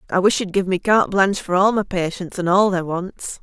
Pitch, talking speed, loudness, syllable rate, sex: 190 Hz, 265 wpm, -19 LUFS, 5.6 syllables/s, female